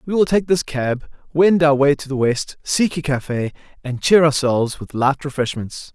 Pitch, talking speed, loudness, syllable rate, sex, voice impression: 140 Hz, 200 wpm, -18 LUFS, 4.8 syllables/s, male, masculine, very adult-like, slightly thick, slightly fluent, slightly cool, sincere, slightly lively